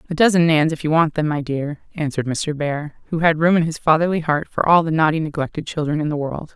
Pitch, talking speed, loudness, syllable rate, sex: 155 Hz, 255 wpm, -19 LUFS, 6.1 syllables/s, female